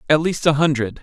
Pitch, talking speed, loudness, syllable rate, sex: 150 Hz, 235 wpm, -18 LUFS, 6.0 syllables/s, male